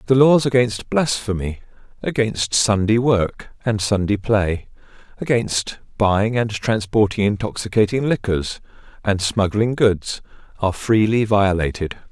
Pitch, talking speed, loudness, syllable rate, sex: 110 Hz, 110 wpm, -19 LUFS, 4.2 syllables/s, male